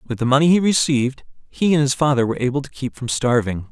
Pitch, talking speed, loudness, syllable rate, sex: 135 Hz, 240 wpm, -19 LUFS, 6.7 syllables/s, male